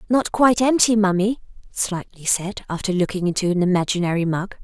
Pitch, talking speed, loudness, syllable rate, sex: 195 Hz, 155 wpm, -20 LUFS, 5.7 syllables/s, female